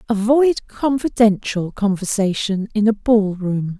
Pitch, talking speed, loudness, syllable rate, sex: 215 Hz, 110 wpm, -18 LUFS, 3.9 syllables/s, female